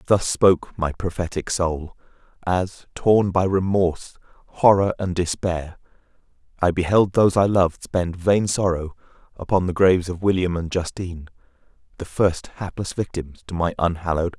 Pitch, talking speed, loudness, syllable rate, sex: 90 Hz, 145 wpm, -21 LUFS, 5.1 syllables/s, male